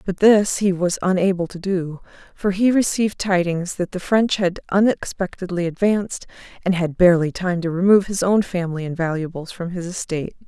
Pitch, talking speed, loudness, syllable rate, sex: 185 Hz, 180 wpm, -20 LUFS, 5.5 syllables/s, female